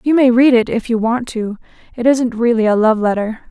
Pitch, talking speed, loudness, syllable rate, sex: 235 Hz, 240 wpm, -15 LUFS, 5.4 syllables/s, female